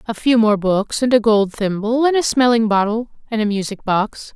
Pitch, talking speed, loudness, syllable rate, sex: 220 Hz, 220 wpm, -17 LUFS, 5.0 syllables/s, female